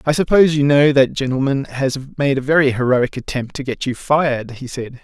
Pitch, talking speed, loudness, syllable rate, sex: 135 Hz, 215 wpm, -17 LUFS, 5.5 syllables/s, male